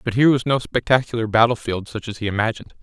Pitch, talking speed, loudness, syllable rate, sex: 115 Hz, 235 wpm, -20 LUFS, 7.1 syllables/s, male